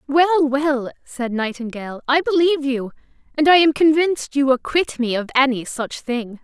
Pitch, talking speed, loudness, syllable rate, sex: 275 Hz, 170 wpm, -19 LUFS, 5.0 syllables/s, female